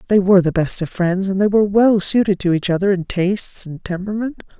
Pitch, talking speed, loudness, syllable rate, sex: 190 Hz, 235 wpm, -17 LUFS, 6.1 syllables/s, female